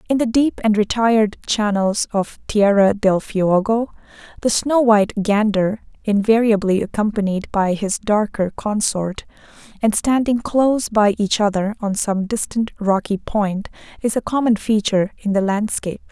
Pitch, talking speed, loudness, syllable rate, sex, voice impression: 210 Hz, 140 wpm, -18 LUFS, 4.6 syllables/s, female, feminine, slightly young, slightly weak, bright, soft, fluent, raspy, slightly cute, calm, friendly, reassuring, slightly elegant, kind, slightly modest